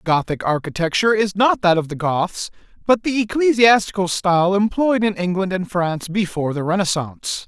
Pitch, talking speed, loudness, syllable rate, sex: 190 Hz, 160 wpm, -18 LUFS, 5.4 syllables/s, male